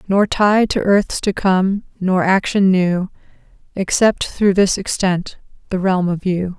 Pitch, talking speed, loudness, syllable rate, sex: 190 Hz, 155 wpm, -17 LUFS, 3.7 syllables/s, female